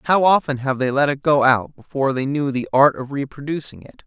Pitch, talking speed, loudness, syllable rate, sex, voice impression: 140 Hz, 235 wpm, -19 LUFS, 5.7 syllables/s, male, very masculine, very adult-like, slightly thick, tensed, slightly powerful, bright, slightly hard, clear, fluent, slightly cool, intellectual, refreshing, sincere, calm, slightly mature, friendly, reassuring, unique, slightly elegant, wild, slightly sweet, slightly lively, kind, slightly modest